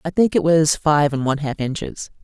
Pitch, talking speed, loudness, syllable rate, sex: 155 Hz, 240 wpm, -18 LUFS, 5.5 syllables/s, female